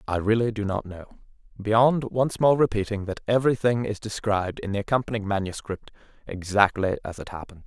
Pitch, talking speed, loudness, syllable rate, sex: 105 Hz, 165 wpm, -24 LUFS, 5.8 syllables/s, male